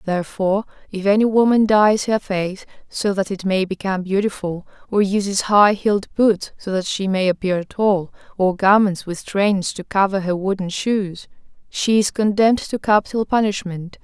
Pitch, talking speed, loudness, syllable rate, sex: 200 Hz, 165 wpm, -19 LUFS, 4.8 syllables/s, female